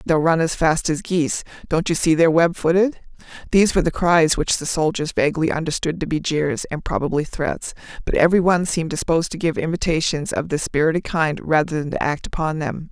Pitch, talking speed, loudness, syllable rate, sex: 160 Hz, 205 wpm, -20 LUFS, 6.0 syllables/s, female